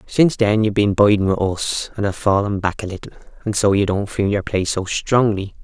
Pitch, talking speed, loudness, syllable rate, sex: 100 Hz, 235 wpm, -18 LUFS, 5.7 syllables/s, male